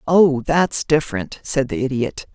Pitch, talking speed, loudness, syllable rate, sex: 145 Hz, 155 wpm, -19 LUFS, 4.2 syllables/s, female